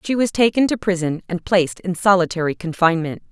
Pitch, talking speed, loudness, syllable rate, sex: 185 Hz, 180 wpm, -19 LUFS, 6.1 syllables/s, female